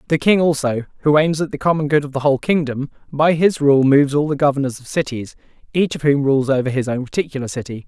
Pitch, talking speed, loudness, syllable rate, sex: 145 Hz, 235 wpm, -18 LUFS, 6.4 syllables/s, male